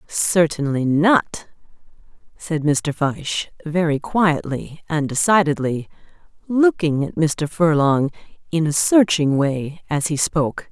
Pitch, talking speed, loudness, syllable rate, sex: 160 Hz, 110 wpm, -19 LUFS, 3.8 syllables/s, female